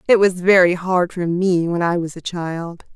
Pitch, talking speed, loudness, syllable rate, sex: 175 Hz, 225 wpm, -18 LUFS, 4.4 syllables/s, female